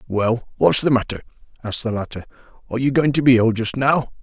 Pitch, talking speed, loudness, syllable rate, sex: 120 Hz, 215 wpm, -19 LUFS, 6.6 syllables/s, male